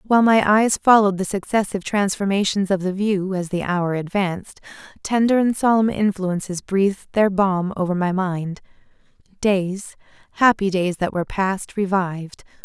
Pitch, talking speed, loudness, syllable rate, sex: 195 Hz, 145 wpm, -20 LUFS, 5.0 syllables/s, female